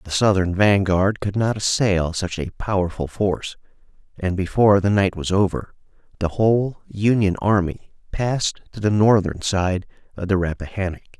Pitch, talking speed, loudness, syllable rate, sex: 95 Hz, 150 wpm, -20 LUFS, 4.9 syllables/s, male